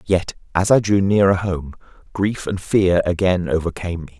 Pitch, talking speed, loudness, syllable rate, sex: 90 Hz, 170 wpm, -19 LUFS, 4.9 syllables/s, male